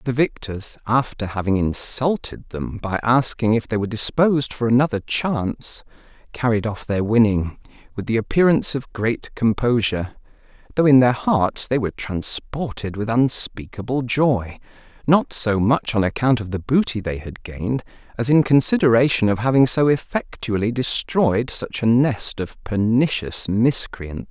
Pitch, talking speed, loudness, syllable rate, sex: 120 Hz, 150 wpm, -20 LUFS, 4.6 syllables/s, male